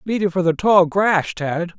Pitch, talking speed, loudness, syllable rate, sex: 180 Hz, 235 wpm, -18 LUFS, 4.3 syllables/s, male